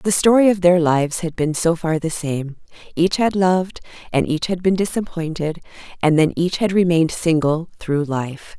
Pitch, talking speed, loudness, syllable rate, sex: 170 Hz, 190 wpm, -19 LUFS, 4.9 syllables/s, female